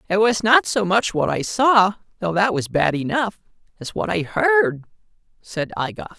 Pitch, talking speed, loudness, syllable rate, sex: 185 Hz, 195 wpm, -19 LUFS, 4.4 syllables/s, male